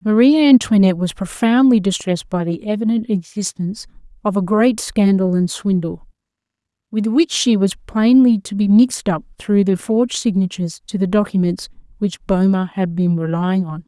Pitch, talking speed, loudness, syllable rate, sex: 200 Hz, 160 wpm, -17 LUFS, 5.1 syllables/s, female